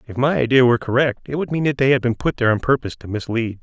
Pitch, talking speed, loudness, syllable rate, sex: 125 Hz, 300 wpm, -19 LUFS, 7.2 syllables/s, male